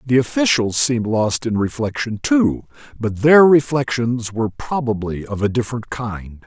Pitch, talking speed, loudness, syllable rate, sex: 120 Hz, 150 wpm, -18 LUFS, 4.7 syllables/s, male